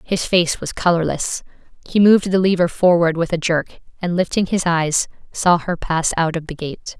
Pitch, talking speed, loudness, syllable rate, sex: 170 Hz, 195 wpm, -18 LUFS, 5.0 syllables/s, female